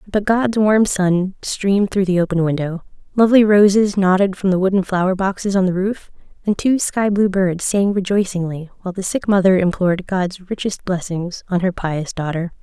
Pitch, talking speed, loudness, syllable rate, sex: 190 Hz, 185 wpm, -17 LUFS, 5.1 syllables/s, female